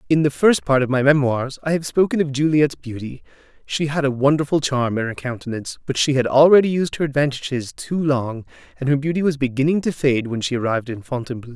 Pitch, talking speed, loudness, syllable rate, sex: 140 Hz, 220 wpm, -20 LUFS, 6.2 syllables/s, male